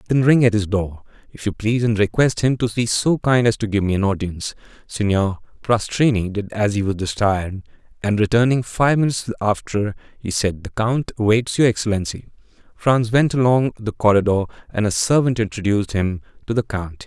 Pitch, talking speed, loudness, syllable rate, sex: 110 Hz, 185 wpm, -19 LUFS, 5.5 syllables/s, male